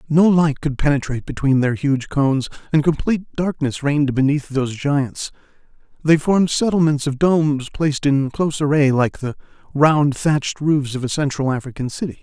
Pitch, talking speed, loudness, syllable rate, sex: 145 Hz, 165 wpm, -19 LUFS, 5.4 syllables/s, male